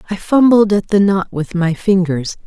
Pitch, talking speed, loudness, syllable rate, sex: 190 Hz, 195 wpm, -14 LUFS, 4.6 syllables/s, female